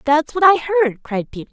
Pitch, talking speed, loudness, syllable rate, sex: 295 Hz, 235 wpm, -17 LUFS, 6.9 syllables/s, female